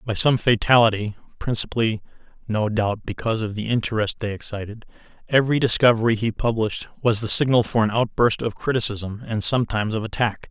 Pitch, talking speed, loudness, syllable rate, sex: 110 Hz, 160 wpm, -21 LUFS, 6.0 syllables/s, male